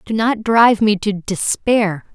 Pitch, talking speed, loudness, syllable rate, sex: 210 Hz, 170 wpm, -16 LUFS, 4.0 syllables/s, female